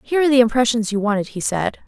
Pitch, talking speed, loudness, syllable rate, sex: 230 Hz, 255 wpm, -18 LUFS, 7.6 syllables/s, female